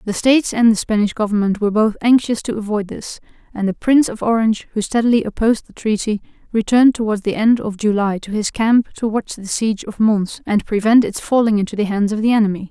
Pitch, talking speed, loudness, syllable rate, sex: 215 Hz, 220 wpm, -17 LUFS, 6.1 syllables/s, female